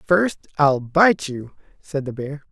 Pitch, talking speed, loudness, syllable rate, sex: 150 Hz, 165 wpm, -20 LUFS, 3.7 syllables/s, male